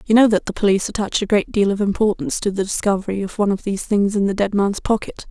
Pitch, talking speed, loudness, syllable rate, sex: 205 Hz, 270 wpm, -19 LUFS, 6.9 syllables/s, female